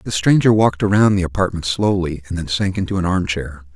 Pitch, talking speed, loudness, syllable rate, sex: 90 Hz, 210 wpm, -17 LUFS, 6.0 syllables/s, male